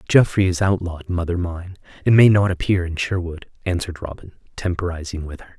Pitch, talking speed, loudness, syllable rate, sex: 90 Hz, 170 wpm, -20 LUFS, 5.8 syllables/s, male